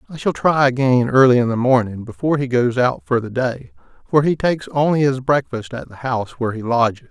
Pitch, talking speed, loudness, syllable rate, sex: 125 Hz, 230 wpm, -18 LUFS, 5.8 syllables/s, male